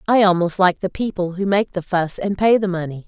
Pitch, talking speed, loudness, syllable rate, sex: 185 Hz, 255 wpm, -19 LUFS, 5.5 syllables/s, female